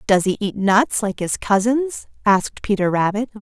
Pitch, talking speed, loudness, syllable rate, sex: 210 Hz, 175 wpm, -19 LUFS, 4.6 syllables/s, female